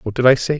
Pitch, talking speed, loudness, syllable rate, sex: 130 Hz, 405 wpm, -15 LUFS, 6.7 syllables/s, male